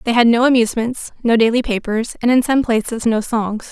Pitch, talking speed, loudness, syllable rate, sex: 230 Hz, 210 wpm, -16 LUFS, 5.5 syllables/s, female